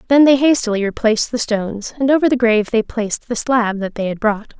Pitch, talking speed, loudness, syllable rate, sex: 230 Hz, 235 wpm, -16 LUFS, 6.0 syllables/s, female